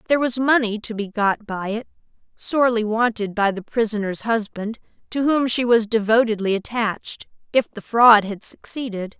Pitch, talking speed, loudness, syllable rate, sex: 225 Hz, 165 wpm, -20 LUFS, 2.8 syllables/s, female